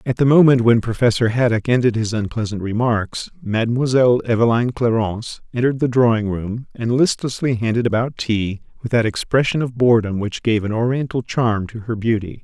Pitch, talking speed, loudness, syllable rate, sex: 115 Hz, 170 wpm, -18 LUFS, 5.6 syllables/s, male